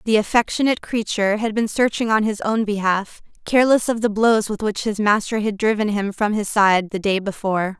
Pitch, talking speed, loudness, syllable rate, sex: 210 Hz, 210 wpm, -19 LUFS, 5.6 syllables/s, female